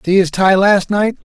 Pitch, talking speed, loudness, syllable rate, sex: 195 Hz, 230 wpm, -13 LUFS, 4.6 syllables/s, male